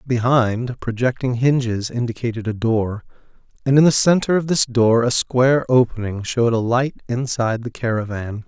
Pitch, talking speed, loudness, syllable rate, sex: 120 Hz, 155 wpm, -19 LUFS, 5.0 syllables/s, male